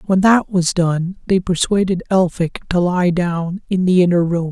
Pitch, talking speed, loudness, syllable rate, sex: 180 Hz, 185 wpm, -17 LUFS, 4.3 syllables/s, male